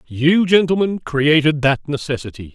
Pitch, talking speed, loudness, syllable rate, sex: 150 Hz, 120 wpm, -16 LUFS, 4.6 syllables/s, male